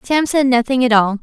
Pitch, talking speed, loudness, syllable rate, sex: 250 Hz, 245 wpm, -14 LUFS, 5.4 syllables/s, female